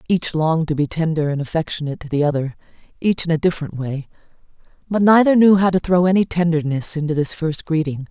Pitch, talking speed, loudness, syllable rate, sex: 160 Hz, 190 wpm, -18 LUFS, 6.3 syllables/s, female